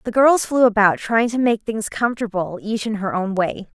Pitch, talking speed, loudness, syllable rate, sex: 220 Hz, 220 wpm, -19 LUFS, 5.2 syllables/s, female